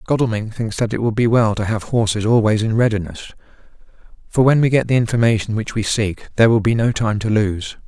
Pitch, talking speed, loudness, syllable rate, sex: 110 Hz, 220 wpm, -17 LUFS, 6.1 syllables/s, male